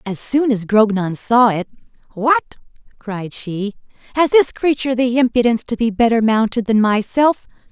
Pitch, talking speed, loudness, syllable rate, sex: 230 Hz, 155 wpm, -16 LUFS, 4.8 syllables/s, female